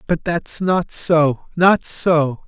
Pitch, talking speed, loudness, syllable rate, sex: 165 Hz, 145 wpm, -17 LUFS, 2.7 syllables/s, male